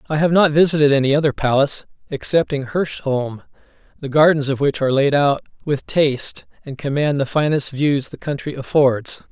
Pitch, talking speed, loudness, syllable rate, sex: 145 Hz, 170 wpm, -18 LUFS, 5.3 syllables/s, male